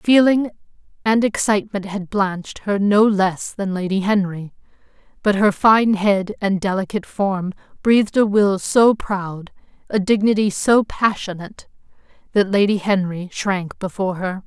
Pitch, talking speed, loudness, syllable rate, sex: 200 Hz, 135 wpm, -19 LUFS, 4.5 syllables/s, female